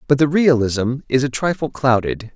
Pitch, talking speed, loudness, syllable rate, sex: 130 Hz, 180 wpm, -18 LUFS, 4.8 syllables/s, male